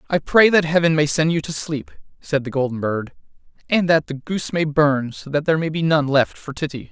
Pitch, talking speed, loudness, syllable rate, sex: 150 Hz, 245 wpm, -19 LUFS, 5.5 syllables/s, male